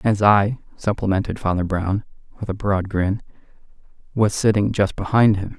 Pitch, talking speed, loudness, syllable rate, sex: 100 Hz, 150 wpm, -20 LUFS, 4.9 syllables/s, male